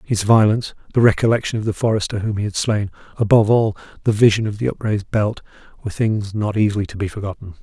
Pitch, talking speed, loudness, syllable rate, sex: 105 Hz, 195 wpm, -19 LUFS, 6.8 syllables/s, male